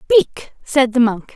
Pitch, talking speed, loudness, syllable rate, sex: 260 Hz, 175 wpm, -16 LUFS, 4.6 syllables/s, female